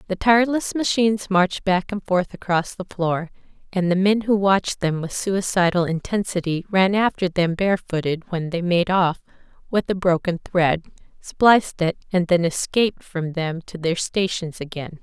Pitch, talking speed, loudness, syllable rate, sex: 185 Hz, 170 wpm, -21 LUFS, 4.8 syllables/s, female